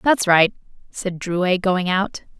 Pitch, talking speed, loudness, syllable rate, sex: 190 Hz, 150 wpm, -19 LUFS, 3.3 syllables/s, female